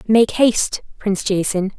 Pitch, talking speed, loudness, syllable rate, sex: 205 Hz, 135 wpm, -18 LUFS, 4.8 syllables/s, female